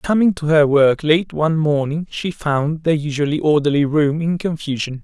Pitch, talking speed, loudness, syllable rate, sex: 150 Hz, 180 wpm, -17 LUFS, 4.8 syllables/s, male